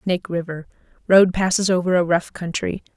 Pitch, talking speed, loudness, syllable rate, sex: 180 Hz, 140 wpm, -19 LUFS, 5.4 syllables/s, female